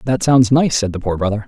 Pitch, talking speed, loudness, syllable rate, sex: 115 Hz, 285 wpm, -15 LUFS, 6.0 syllables/s, male